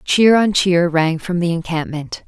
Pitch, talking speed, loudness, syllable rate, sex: 175 Hz, 185 wpm, -16 LUFS, 4.2 syllables/s, female